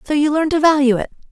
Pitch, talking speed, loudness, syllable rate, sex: 295 Hz, 275 wpm, -16 LUFS, 7.1 syllables/s, female